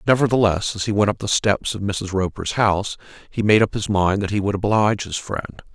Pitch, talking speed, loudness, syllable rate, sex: 100 Hz, 230 wpm, -20 LUFS, 5.8 syllables/s, male